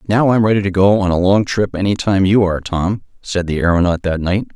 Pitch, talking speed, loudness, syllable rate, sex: 95 Hz, 250 wpm, -15 LUFS, 5.8 syllables/s, male